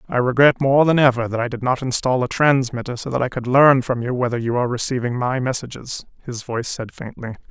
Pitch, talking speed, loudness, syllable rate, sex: 125 Hz, 230 wpm, -19 LUFS, 6.1 syllables/s, male